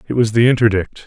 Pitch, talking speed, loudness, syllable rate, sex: 110 Hz, 225 wpm, -15 LUFS, 6.7 syllables/s, male